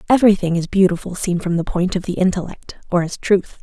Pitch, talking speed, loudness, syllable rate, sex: 185 Hz, 230 wpm, -18 LUFS, 6.1 syllables/s, female